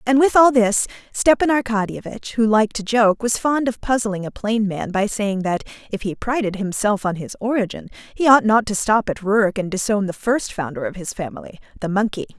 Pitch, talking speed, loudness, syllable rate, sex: 215 Hz, 210 wpm, -19 LUFS, 5.4 syllables/s, female